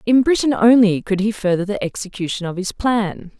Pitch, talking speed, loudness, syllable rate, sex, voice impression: 210 Hz, 195 wpm, -18 LUFS, 5.3 syllables/s, female, feminine, adult-like, slightly relaxed, powerful, slightly soft, slightly clear, raspy, intellectual, calm, slightly reassuring, elegant, lively, slightly sharp